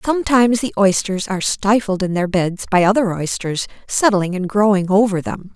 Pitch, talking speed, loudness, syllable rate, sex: 200 Hz, 175 wpm, -17 LUFS, 5.2 syllables/s, female